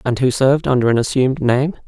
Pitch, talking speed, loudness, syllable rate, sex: 130 Hz, 225 wpm, -16 LUFS, 6.6 syllables/s, male